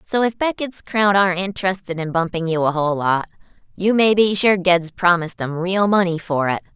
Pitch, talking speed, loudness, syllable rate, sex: 185 Hz, 205 wpm, -18 LUFS, 5.3 syllables/s, female